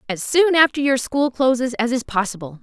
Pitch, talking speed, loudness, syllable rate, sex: 250 Hz, 205 wpm, -18 LUFS, 5.3 syllables/s, female